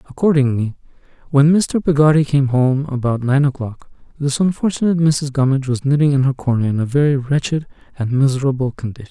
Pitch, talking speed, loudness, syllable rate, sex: 140 Hz, 165 wpm, -17 LUFS, 6.1 syllables/s, male